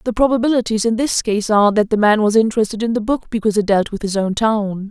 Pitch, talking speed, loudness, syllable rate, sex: 215 Hz, 255 wpm, -16 LUFS, 6.6 syllables/s, female